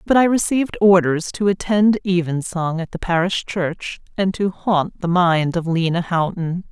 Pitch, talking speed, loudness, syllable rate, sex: 180 Hz, 170 wpm, -19 LUFS, 4.4 syllables/s, female